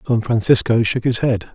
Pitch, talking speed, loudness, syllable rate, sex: 115 Hz, 195 wpm, -17 LUFS, 5.2 syllables/s, male